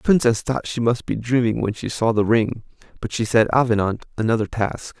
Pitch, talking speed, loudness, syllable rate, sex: 115 Hz, 215 wpm, -21 LUFS, 5.4 syllables/s, male